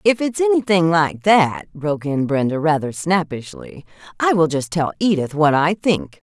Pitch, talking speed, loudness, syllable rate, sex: 170 Hz, 170 wpm, -18 LUFS, 4.6 syllables/s, female